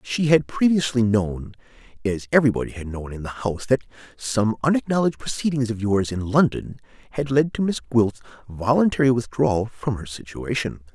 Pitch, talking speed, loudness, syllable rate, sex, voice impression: 115 Hz, 160 wpm, -22 LUFS, 5.5 syllables/s, male, masculine, adult-like, slightly thick, slightly fluent, cool, sincere, slightly calm, slightly elegant